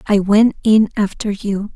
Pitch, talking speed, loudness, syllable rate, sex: 205 Hz, 170 wpm, -15 LUFS, 4.1 syllables/s, female